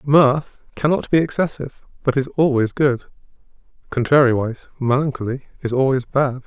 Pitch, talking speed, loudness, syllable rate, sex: 135 Hz, 120 wpm, -19 LUFS, 5.3 syllables/s, male